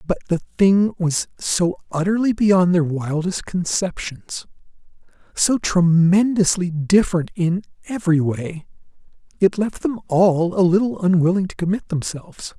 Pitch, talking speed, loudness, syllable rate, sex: 180 Hz, 125 wpm, -19 LUFS, 4.4 syllables/s, male